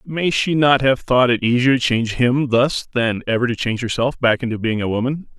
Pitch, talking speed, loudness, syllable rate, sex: 125 Hz, 235 wpm, -18 LUFS, 5.5 syllables/s, male